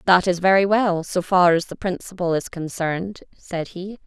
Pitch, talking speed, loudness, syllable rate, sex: 180 Hz, 190 wpm, -21 LUFS, 4.8 syllables/s, female